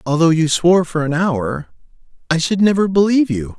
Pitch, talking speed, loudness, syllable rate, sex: 160 Hz, 185 wpm, -16 LUFS, 5.5 syllables/s, male